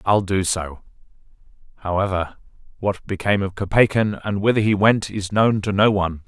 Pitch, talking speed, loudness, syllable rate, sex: 100 Hz, 165 wpm, -20 LUFS, 5.3 syllables/s, male